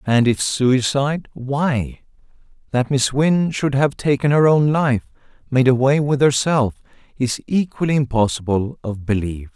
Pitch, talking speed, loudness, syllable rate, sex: 130 Hz, 130 wpm, -18 LUFS, 4.3 syllables/s, male